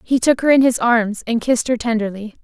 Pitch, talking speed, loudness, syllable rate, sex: 235 Hz, 245 wpm, -17 LUFS, 5.8 syllables/s, female